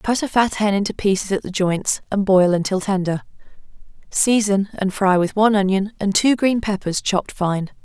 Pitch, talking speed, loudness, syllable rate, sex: 200 Hz, 190 wpm, -19 LUFS, 5.1 syllables/s, female